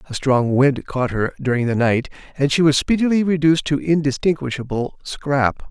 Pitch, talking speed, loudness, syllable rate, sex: 140 Hz, 170 wpm, -19 LUFS, 5.1 syllables/s, male